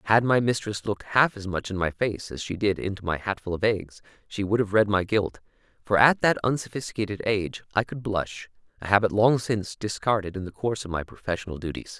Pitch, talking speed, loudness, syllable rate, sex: 105 Hz, 220 wpm, -25 LUFS, 5.9 syllables/s, male